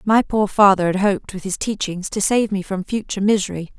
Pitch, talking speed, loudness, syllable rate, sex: 200 Hz, 220 wpm, -19 LUFS, 5.8 syllables/s, female